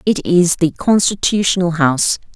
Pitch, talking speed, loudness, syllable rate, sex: 175 Hz, 130 wpm, -15 LUFS, 4.8 syllables/s, female